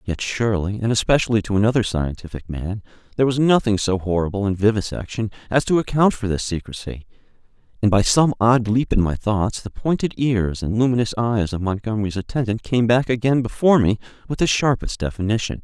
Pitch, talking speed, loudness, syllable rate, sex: 110 Hz, 180 wpm, -20 LUFS, 5.9 syllables/s, male